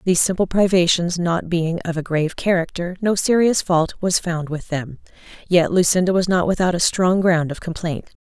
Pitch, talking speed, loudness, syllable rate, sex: 175 Hz, 190 wpm, -19 LUFS, 5.2 syllables/s, female